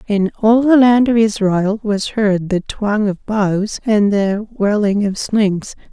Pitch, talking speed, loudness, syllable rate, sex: 210 Hz, 170 wpm, -15 LUFS, 3.5 syllables/s, female